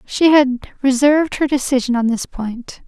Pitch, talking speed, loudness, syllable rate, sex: 265 Hz, 165 wpm, -16 LUFS, 4.6 syllables/s, female